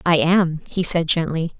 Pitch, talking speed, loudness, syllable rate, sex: 170 Hz, 190 wpm, -19 LUFS, 4.4 syllables/s, female